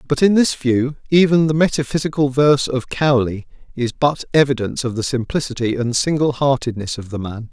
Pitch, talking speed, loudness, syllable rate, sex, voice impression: 135 Hz, 175 wpm, -18 LUFS, 5.5 syllables/s, male, masculine, adult-like, slightly middle-aged, slightly thick, tensed, slightly weak, slightly dark, slightly soft, slightly muffled, slightly fluent, slightly cool, intellectual, slightly refreshing, slightly sincere, calm, slightly mature, slightly reassuring, slightly wild, lively, slightly strict, slightly intense, modest